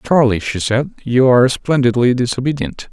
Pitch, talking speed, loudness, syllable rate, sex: 125 Hz, 145 wpm, -15 LUFS, 5.2 syllables/s, male